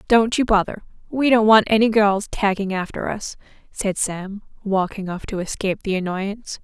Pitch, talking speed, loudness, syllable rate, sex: 205 Hz, 170 wpm, -20 LUFS, 4.9 syllables/s, female